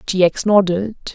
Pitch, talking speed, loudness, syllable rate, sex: 190 Hz, 160 wpm, -16 LUFS, 4.7 syllables/s, female